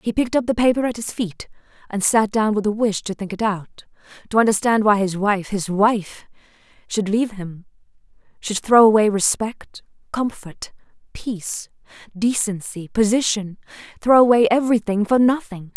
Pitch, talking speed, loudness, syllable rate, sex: 215 Hz, 150 wpm, -19 LUFS, 4.9 syllables/s, female